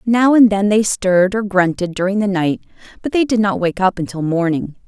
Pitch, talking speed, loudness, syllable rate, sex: 200 Hz, 220 wpm, -16 LUFS, 5.4 syllables/s, female